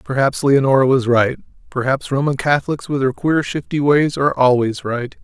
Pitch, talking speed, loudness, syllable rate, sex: 135 Hz, 170 wpm, -17 LUFS, 5.2 syllables/s, male